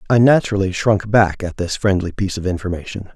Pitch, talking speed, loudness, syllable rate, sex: 100 Hz, 190 wpm, -18 LUFS, 6.2 syllables/s, male